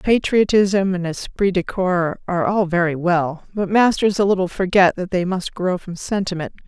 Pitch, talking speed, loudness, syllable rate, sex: 185 Hz, 180 wpm, -19 LUFS, 4.7 syllables/s, female